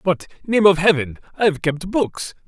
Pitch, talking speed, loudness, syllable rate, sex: 170 Hz, 145 wpm, -19 LUFS, 4.6 syllables/s, male